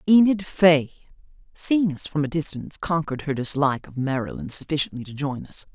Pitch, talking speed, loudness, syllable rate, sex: 150 Hz, 165 wpm, -23 LUFS, 5.8 syllables/s, female